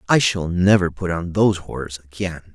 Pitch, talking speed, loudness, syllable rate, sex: 90 Hz, 190 wpm, -20 LUFS, 5.3 syllables/s, male